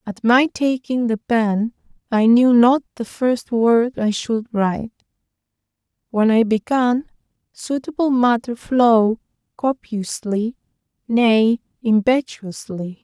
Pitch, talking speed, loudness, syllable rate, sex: 235 Hz, 105 wpm, -18 LUFS, 3.6 syllables/s, female